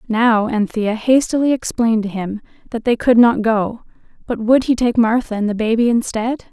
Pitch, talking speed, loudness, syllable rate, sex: 230 Hz, 185 wpm, -16 LUFS, 5.0 syllables/s, female